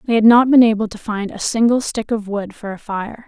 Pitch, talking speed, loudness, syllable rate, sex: 215 Hz, 275 wpm, -16 LUFS, 5.4 syllables/s, female